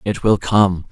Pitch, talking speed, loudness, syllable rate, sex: 100 Hz, 195 wpm, -16 LUFS, 3.9 syllables/s, male